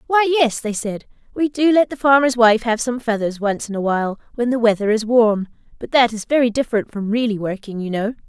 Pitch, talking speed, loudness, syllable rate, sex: 230 Hz, 230 wpm, -18 LUFS, 5.7 syllables/s, female